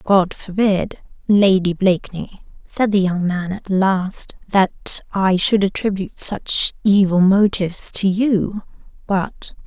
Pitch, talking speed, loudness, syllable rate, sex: 195 Hz, 125 wpm, -18 LUFS, 3.6 syllables/s, female